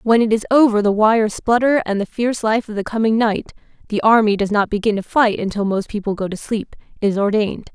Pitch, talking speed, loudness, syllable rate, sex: 215 Hz, 215 wpm, -18 LUFS, 5.9 syllables/s, female